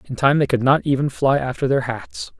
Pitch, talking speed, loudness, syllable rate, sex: 125 Hz, 250 wpm, -19 LUFS, 5.4 syllables/s, male